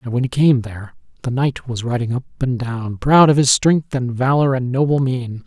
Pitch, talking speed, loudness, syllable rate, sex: 130 Hz, 230 wpm, -17 LUFS, 5.1 syllables/s, male